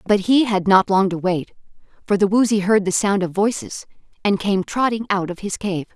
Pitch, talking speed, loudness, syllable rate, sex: 200 Hz, 220 wpm, -19 LUFS, 5.1 syllables/s, female